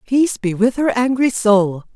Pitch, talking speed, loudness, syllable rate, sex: 230 Hz, 185 wpm, -16 LUFS, 4.6 syllables/s, female